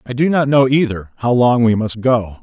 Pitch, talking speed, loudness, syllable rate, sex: 120 Hz, 250 wpm, -15 LUFS, 5.0 syllables/s, male